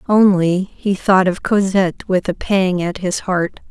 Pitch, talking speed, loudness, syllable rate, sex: 185 Hz, 180 wpm, -17 LUFS, 4.1 syllables/s, female